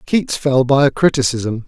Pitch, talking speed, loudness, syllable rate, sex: 135 Hz, 180 wpm, -15 LUFS, 4.5 syllables/s, male